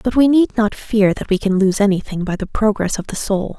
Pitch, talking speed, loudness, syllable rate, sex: 205 Hz, 285 wpm, -17 LUFS, 5.4 syllables/s, female